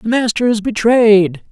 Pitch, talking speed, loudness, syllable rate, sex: 220 Hz, 160 wpm, -13 LUFS, 4.2 syllables/s, male